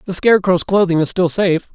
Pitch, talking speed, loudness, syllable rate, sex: 180 Hz, 205 wpm, -15 LUFS, 6.3 syllables/s, male